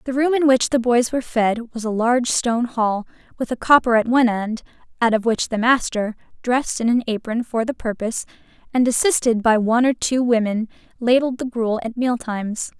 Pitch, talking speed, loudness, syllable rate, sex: 235 Hz, 200 wpm, -20 LUFS, 5.6 syllables/s, female